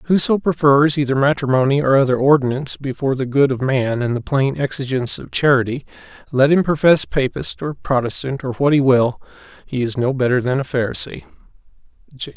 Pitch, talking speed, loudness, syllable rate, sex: 135 Hz, 170 wpm, -17 LUFS, 5.8 syllables/s, male